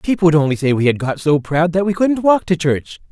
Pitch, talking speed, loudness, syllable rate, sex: 165 Hz, 290 wpm, -16 LUFS, 5.7 syllables/s, male